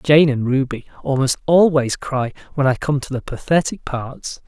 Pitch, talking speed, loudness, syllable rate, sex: 140 Hz, 175 wpm, -19 LUFS, 4.6 syllables/s, male